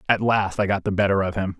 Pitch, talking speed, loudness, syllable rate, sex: 100 Hz, 300 wpm, -22 LUFS, 6.4 syllables/s, male